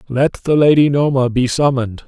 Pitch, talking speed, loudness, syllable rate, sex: 135 Hz, 175 wpm, -15 LUFS, 5.3 syllables/s, male